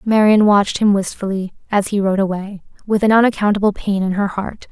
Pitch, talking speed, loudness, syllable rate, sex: 200 Hz, 190 wpm, -16 LUFS, 5.7 syllables/s, female